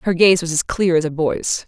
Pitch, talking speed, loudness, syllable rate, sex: 170 Hz, 285 wpm, -17 LUFS, 5.2 syllables/s, female